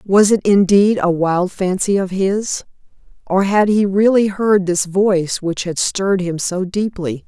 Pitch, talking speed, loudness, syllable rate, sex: 190 Hz, 175 wpm, -16 LUFS, 4.2 syllables/s, female